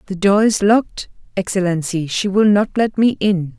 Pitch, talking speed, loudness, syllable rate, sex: 195 Hz, 185 wpm, -16 LUFS, 4.9 syllables/s, female